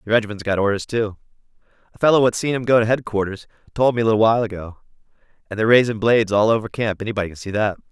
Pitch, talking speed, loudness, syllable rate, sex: 110 Hz, 220 wpm, -19 LUFS, 7.7 syllables/s, male